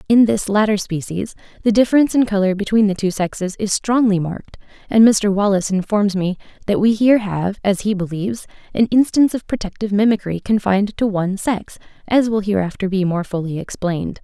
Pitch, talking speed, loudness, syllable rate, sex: 205 Hz, 180 wpm, -18 LUFS, 5.9 syllables/s, female